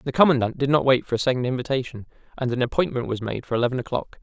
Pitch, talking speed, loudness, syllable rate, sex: 130 Hz, 240 wpm, -23 LUFS, 7.4 syllables/s, male